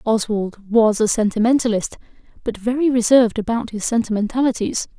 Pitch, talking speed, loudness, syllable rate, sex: 225 Hz, 120 wpm, -19 LUFS, 5.6 syllables/s, female